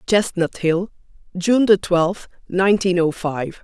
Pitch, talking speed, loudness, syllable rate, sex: 185 Hz, 115 wpm, -19 LUFS, 3.5 syllables/s, female